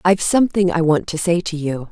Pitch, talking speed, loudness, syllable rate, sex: 170 Hz, 250 wpm, -18 LUFS, 6.1 syllables/s, female